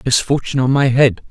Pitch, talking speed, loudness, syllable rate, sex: 130 Hz, 185 wpm, -15 LUFS, 6.2 syllables/s, male